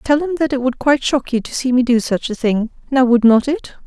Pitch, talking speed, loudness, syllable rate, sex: 255 Hz, 295 wpm, -16 LUFS, 5.7 syllables/s, female